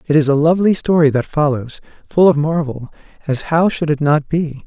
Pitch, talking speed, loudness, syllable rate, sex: 155 Hz, 205 wpm, -15 LUFS, 5.4 syllables/s, male